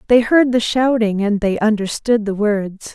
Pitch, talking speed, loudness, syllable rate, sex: 220 Hz, 185 wpm, -16 LUFS, 4.4 syllables/s, female